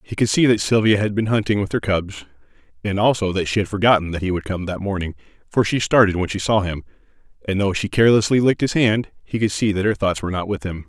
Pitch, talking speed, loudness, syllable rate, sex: 100 Hz, 260 wpm, -19 LUFS, 6.5 syllables/s, male